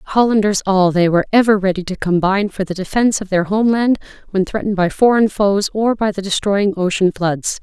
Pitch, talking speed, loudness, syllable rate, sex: 200 Hz, 195 wpm, -16 LUFS, 5.8 syllables/s, female